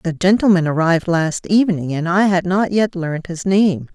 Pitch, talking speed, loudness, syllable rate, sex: 180 Hz, 200 wpm, -17 LUFS, 5.2 syllables/s, female